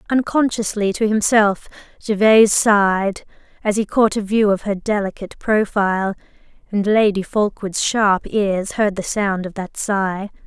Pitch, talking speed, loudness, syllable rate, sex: 205 Hz, 145 wpm, -18 LUFS, 4.5 syllables/s, female